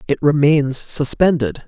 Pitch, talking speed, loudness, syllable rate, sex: 145 Hz, 105 wpm, -16 LUFS, 4.0 syllables/s, male